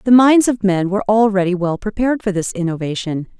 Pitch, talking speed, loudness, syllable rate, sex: 200 Hz, 195 wpm, -16 LUFS, 6.1 syllables/s, female